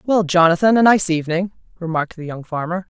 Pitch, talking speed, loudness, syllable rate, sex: 175 Hz, 185 wpm, -17 LUFS, 6.2 syllables/s, female